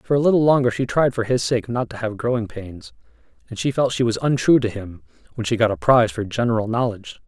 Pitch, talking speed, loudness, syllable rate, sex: 115 Hz, 245 wpm, -20 LUFS, 6.2 syllables/s, male